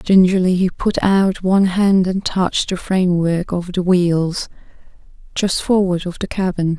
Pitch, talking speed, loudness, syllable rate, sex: 185 Hz, 160 wpm, -17 LUFS, 4.5 syllables/s, female